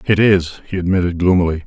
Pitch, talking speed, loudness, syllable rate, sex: 90 Hz, 180 wpm, -16 LUFS, 6.1 syllables/s, male